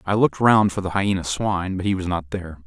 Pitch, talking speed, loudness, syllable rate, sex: 95 Hz, 270 wpm, -21 LUFS, 6.6 syllables/s, male